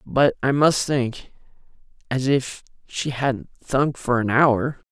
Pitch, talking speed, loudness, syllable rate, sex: 130 Hz, 145 wpm, -21 LUFS, 3.4 syllables/s, male